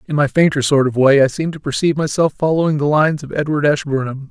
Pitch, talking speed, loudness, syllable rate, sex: 145 Hz, 235 wpm, -16 LUFS, 6.5 syllables/s, male